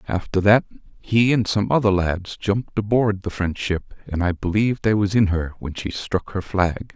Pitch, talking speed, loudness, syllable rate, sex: 100 Hz, 205 wpm, -21 LUFS, 4.8 syllables/s, male